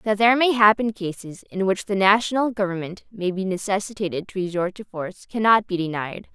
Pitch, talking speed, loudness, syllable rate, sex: 200 Hz, 190 wpm, -22 LUFS, 5.7 syllables/s, female